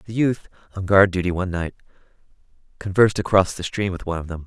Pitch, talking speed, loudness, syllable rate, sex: 95 Hz, 200 wpm, -21 LUFS, 6.7 syllables/s, male